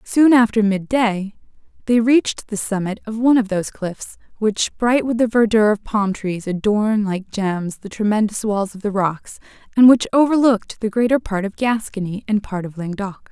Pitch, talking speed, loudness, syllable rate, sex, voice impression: 215 Hz, 190 wpm, -18 LUFS, 5.0 syllables/s, female, feminine, adult-like, slightly relaxed, slightly powerful, soft, raspy, intellectual, calm, friendly, reassuring, elegant, kind, modest